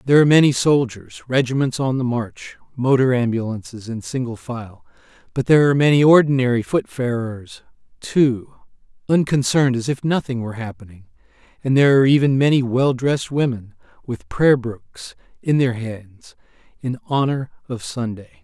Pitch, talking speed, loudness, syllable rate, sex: 130 Hz, 145 wpm, -19 LUFS, 5.3 syllables/s, male